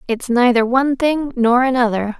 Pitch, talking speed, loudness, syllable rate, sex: 250 Hz, 165 wpm, -16 LUFS, 5.0 syllables/s, female